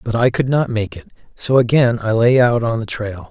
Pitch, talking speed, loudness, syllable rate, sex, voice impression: 115 Hz, 255 wpm, -16 LUFS, 5.1 syllables/s, male, masculine, adult-like, slightly cool, refreshing, slightly sincere